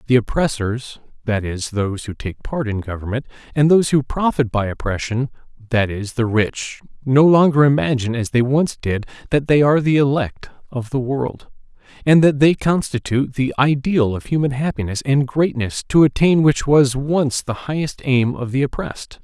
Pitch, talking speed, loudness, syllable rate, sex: 130 Hz, 180 wpm, -18 LUFS, 5.0 syllables/s, male